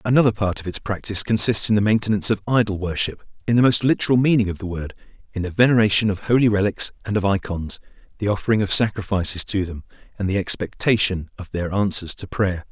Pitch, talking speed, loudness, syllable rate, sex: 100 Hz, 205 wpm, -20 LUFS, 6.4 syllables/s, male